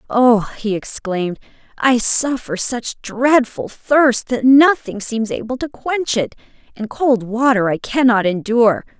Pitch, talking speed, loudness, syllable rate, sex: 235 Hz, 140 wpm, -16 LUFS, 4.0 syllables/s, female